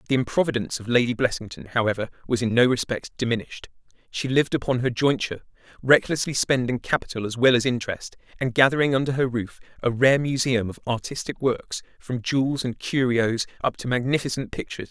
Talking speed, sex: 180 wpm, male